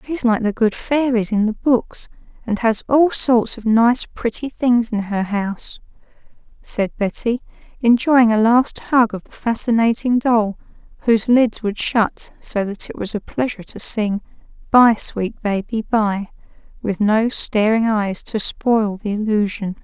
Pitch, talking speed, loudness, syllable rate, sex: 225 Hz, 160 wpm, -18 LUFS, 4.0 syllables/s, female